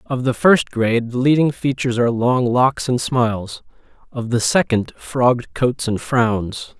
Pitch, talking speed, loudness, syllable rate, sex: 125 Hz, 170 wpm, -18 LUFS, 4.4 syllables/s, male